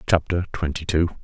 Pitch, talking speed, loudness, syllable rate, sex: 80 Hz, 145 wpm, -24 LUFS, 5.4 syllables/s, male